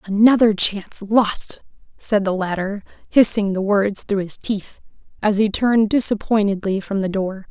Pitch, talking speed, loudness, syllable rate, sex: 205 Hz, 150 wpm, -19 LUFS, 4.6 syllables/s, female